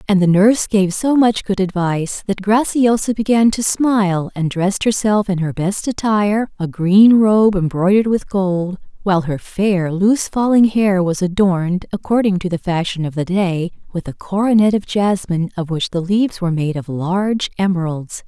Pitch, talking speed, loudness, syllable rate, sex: 195 Hz, 180 wpm, -16 LUFS, 5.0 syllables/s, female